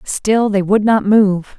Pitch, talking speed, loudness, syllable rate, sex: 205 Hz, 190 wpm, -14 LUFS, 3.4 syllables/s, female